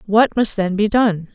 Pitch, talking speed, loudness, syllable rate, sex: 210 Hz, 225 wpm, -17 LUFS, 4.2 syllables/s, female